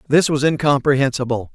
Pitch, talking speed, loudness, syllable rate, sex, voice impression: 140 Hz, 115 wpm, -17 LUFS, 5.8 syllables/s, male, masculine, middle-aged, thick, tensed, powerful, bright, slightly soft, very clear, very fluent, raspy, cool, very intellectual, refreshing, sincere, slightly calm, mature, very friendly, very reassuring, unique, slightly elegant, wild, slightly sweet, very lively, kind, slightly intense, slightly light